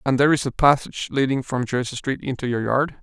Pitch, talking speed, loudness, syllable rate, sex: 130 Hz, 240 wpm, -22 LUFS, 6.3 syllables/s, male